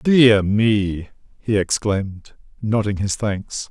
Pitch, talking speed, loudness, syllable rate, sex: 105 Hz, 115 wpm, -19 LUFS, 3.3 syllables/s, male